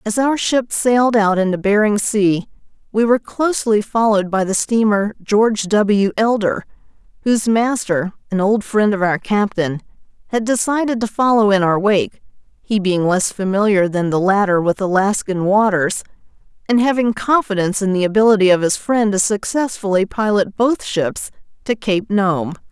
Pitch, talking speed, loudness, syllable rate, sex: 205 Hz, 160 wpm, -16 LUFS, 4.9 syllables/s, female